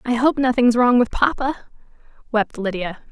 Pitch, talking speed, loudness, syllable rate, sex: 240 Hz, 175 wpm, -19 LUFS, 5.5 syllables/s, female